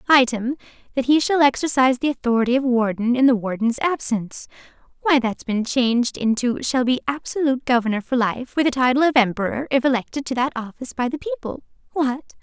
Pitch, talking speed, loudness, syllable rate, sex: 250 Hz, 185 wpm, -20 LUFS, 6.1 syllables/s, female